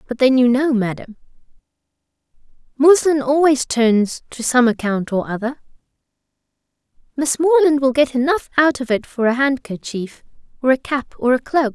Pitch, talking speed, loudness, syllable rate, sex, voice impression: 260 Hz, 155 wpm, -17 LUFS, 4.9 syllables/s, female, very feminine, young, tensed, slightly cute, friendly, slightly lively